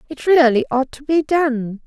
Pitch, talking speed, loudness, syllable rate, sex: 275 Hz, 195 wpm, -17 LUFS, 4.3 syllables/s, female